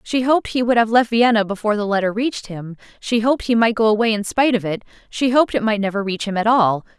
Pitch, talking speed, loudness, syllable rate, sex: 220 Hz, 265 wpm, -18 LUFS, 6.7 syllables/s, female